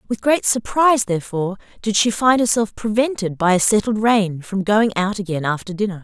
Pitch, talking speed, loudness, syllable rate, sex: 210 Hz, 190 wpm, -18 LUFS, 5.6 syllables/s, female